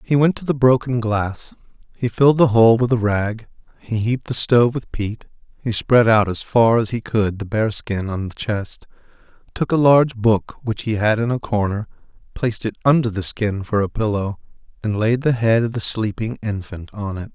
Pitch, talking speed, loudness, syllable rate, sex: 110 Hz, 210 wpm, -19 LUFS, 5.0 syllables/s, male